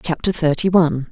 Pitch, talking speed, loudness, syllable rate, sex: 160 Hz, 160 wpm, -17 LUFS, 6.0 syllables/s, female